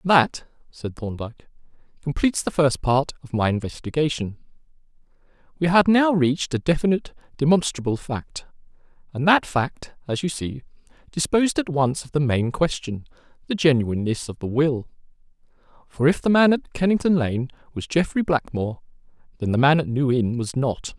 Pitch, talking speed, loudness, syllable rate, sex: 145 Hz, 150 wpm, -22 LUFS, 5.3 syllables/s, male